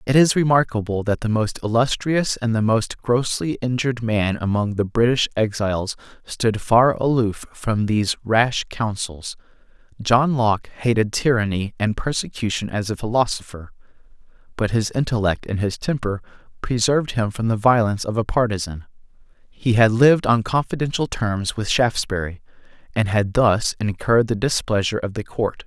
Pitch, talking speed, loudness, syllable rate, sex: 115 Hz, 150 wpm, -20 LUFS, 5.1 syllables/s, male